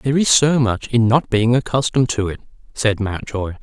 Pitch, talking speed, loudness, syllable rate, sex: 120 Hz, 200 wpm, -17 LUFS, 5.4 syllables/s, male